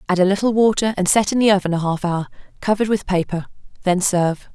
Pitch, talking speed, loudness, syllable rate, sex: 195 Hz, 225 wpm, -19 LUFS, 6.6 syllables/s, female